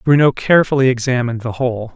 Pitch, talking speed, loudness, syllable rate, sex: 125 Hz, 155 wpm, -15 LUFS, 6.5 syllables/s, male